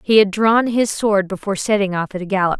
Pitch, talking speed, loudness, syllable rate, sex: 200 Hz, 255 wpm, -17 LUFS, 5.9 syllables/s, female